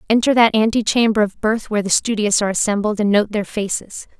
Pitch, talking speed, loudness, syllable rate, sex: 215 Hz, 200 wpm, -17 LUFS, 6.1 syllables/s, female